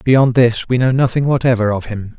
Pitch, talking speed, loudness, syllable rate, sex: 120 Hz, 220 wpm, -15 LUFS, 5.1 syllables/s, male